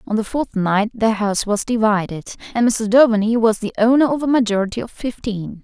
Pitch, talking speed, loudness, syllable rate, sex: 220 Hz, 200 wpm, -18 LUFS, 5.7 syllables/s, female